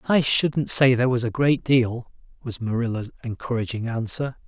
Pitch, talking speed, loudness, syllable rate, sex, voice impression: 125 Hz, 160 wpm, -22 LUFS, 5.0 syllables/s, male, masculine, adult-like, bright, slightly hard, halting, slightly refreshing, friendly, slightly reassuring, unique, kind, modest